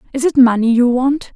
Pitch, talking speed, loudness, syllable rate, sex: 255 Hz, 220 wpm, -13 LUFS, 5.6 syllables/s, female